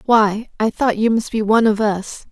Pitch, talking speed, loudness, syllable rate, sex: 220 Hz, 235 wpm, -17 LUFS, 4.8 syllables/s, female